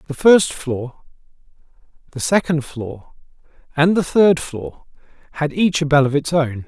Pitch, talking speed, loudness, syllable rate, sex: 150 Hz, 155 wpm, -17 LUFS, 4.3 syllables/s, male